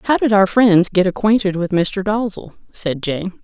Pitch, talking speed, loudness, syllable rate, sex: 195 Hz, 190 wpm, -16 LUFS, 4.5 syllables/s, female